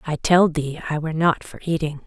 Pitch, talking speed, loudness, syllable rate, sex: 160 Hz, 235 wpm, -21 LUFS, 6.2 syllables/s, female